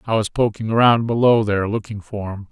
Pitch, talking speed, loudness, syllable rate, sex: 110 Hz, 215 wpm, -18 LUFS, 5.8 syllables/s, male